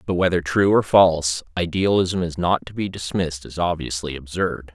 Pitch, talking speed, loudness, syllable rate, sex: 85 Hz, 175 wpm, -21 LUFS, 5.1 syllables/s, male